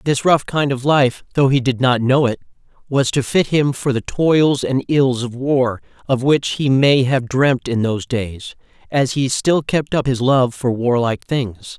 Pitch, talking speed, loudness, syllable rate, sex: 130 Hz, 215 wpm, -17 LUFS, 4.1 syllables/s, male